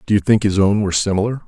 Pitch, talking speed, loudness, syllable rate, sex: 100 Hz, 285 wpm, -16 LUFS, 7.6 syllables/s, male